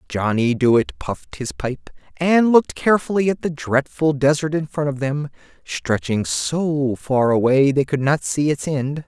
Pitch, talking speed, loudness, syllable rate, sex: 140 Hz, 165 wpm, -19 LUFS, 4.4 syllables/s, male